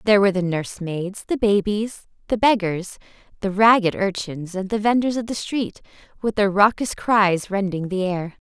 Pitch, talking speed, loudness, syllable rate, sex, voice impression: 200 Hz, 150 wpm, -21 LUFS, 4.9 syllables/s, female, feminine, slightly adult-like, clear, slightly cute, friendly, slightly kind